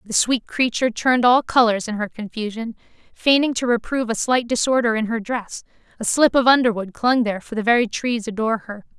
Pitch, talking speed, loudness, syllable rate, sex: 230 Hz, 200 wpm, -19 LUFS, 5.8 syllables/s, female